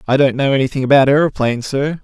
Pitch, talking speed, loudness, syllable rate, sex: 135 Hz, 205 wpm, -15 LUFS, 7.0 syllables/s, male